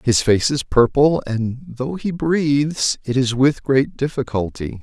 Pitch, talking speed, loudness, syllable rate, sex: 130 Hz, 160 wpm, -19 LUFS, 3.9 syllables/s, male